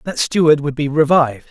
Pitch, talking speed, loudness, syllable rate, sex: 150 Hz, 200 wpm, -15 LUFS, 5.9 syllables/s, male